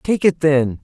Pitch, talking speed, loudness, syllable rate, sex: 150 Hz, 215 wpm, -16 LUFS, 3.8 syllables/s, male